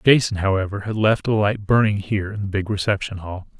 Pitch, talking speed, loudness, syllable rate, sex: 100 Hz, 215 wpm, -21 LUFS, 5.9 syllables/s, male